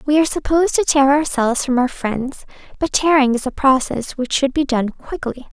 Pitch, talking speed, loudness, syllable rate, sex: 275 Hz, 205 wpm, -17 LUFS, 5.3 syllables/s, female